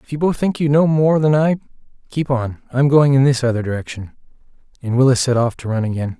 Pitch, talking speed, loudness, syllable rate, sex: 135 Hz, 235 wpm, -17 LUFS, 6.0 syllables/s, male